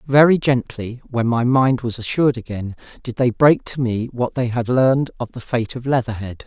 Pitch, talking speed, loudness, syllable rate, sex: 120 Hz, 205 wpm, -19 LUFS, 5.1 syllables/s, male